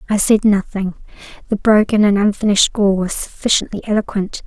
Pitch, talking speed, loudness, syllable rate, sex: 205 Hz, 150 wpm, -16 LUFS, 5.8 syllables/s, female